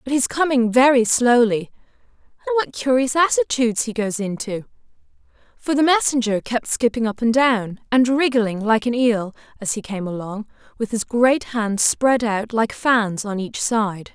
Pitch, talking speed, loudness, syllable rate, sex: 235 Hz, 165 wpm, -19 LUFS, 2.0 syllables/s, female